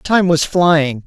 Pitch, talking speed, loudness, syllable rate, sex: 165 Hz, 170 wpm, -14 LUFS, 2.9 syllables/s, female